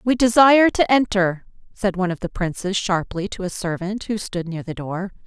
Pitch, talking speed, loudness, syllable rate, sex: 195 Hz, 205 wpm, -20 LUFS, 5.2 syllables/s, female